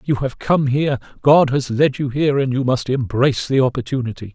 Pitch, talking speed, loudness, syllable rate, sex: 130 Hz, 205 wpm, -18 LUFS, 5.7 syllables/s, male